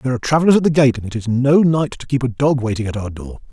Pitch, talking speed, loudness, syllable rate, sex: 130 Hz, 325 wpm, -17 LUFS, 7.1 syllables/s, male